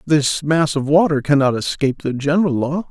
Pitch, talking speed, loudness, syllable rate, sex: 145 Hz, 185 wpm, -17 LUFS, 5.4 syllables/s, male